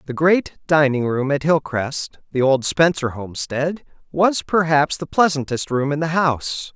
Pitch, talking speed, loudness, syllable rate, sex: 150 Hz, 160 wpm, -19 LUFS, 4.5 syllables/s, male